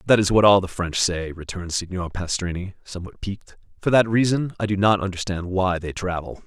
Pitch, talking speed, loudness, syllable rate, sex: 95 Hz, 205 wpm, -22 LUFS, 5.8 syllables/s, male